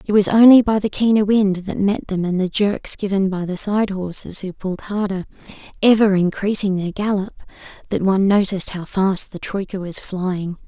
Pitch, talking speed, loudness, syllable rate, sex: 195 Hz, 180 wpm, -18 LUFS, 5.1 syllables/s, female